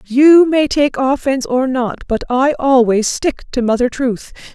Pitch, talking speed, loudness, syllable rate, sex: 260 Hz, 170 wpm, -14 LUFS, 4.3 syllables/s, female